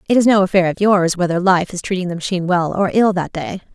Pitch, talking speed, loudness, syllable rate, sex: 185 Hz, 270 wpm, -16 LUFS, 6.5 syllables/s, female